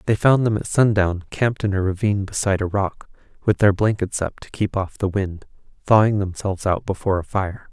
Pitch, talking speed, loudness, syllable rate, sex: 100 Hz, 210 wpm, -21 LUFS, 5.8 syllables/s, male